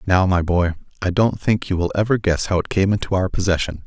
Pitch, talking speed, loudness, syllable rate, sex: 95 Hz, 250 wpm, -20 LUFS, 5.7 syllables/s, male